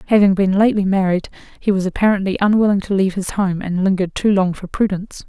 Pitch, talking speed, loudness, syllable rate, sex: 195 Hz, 205 wpm, -17 LUFS, 6.8 syllables/s, female